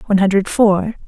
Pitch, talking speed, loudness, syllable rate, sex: 200 Hz, 165 wpm, -15 LUFS, 6.3 syllables/s, female